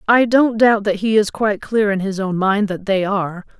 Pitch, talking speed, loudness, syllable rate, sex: 205 Hz, 250 wpm, -17 LUFS, 5.2 syllables/s, female